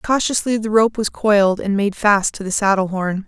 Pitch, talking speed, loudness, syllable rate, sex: 205 Hz, 220 wpm, -17 LUFS, 5.0 syllables/s, female